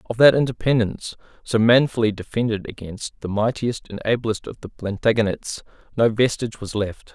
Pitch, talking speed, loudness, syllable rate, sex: 110 Hz, 150 wpm, -21 LUFS, 5.4 syllables/s, male